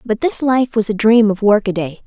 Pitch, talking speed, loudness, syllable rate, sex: 215 Hz, 230 wpm, -15 LUFS, 5.2 syllables/s, female